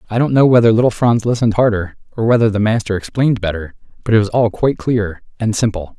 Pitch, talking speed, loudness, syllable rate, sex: 110 Hz, 220 wpm, -15 LUFS, 6.6 syllables/s, male